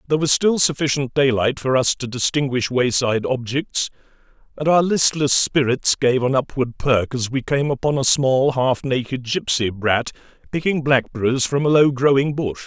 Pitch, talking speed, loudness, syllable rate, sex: 135 Hz, 170 wpm, -19 LUFS, 4.9 syllables/s, male